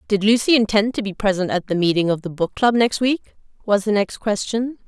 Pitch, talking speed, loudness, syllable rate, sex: 210 Hz, 235 wpm, -19 LUFS, 5.5 syllables/s, female